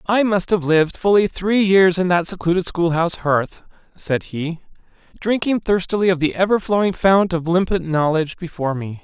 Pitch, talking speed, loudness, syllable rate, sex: 180 Hz, 180 wpm, -18 LUFS, 5.2 syllables/s, male